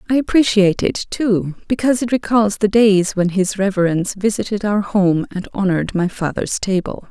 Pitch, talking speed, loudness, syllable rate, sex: 200 Hz, 170 wpm, -17 LUFS, 5.2 syllables/s, female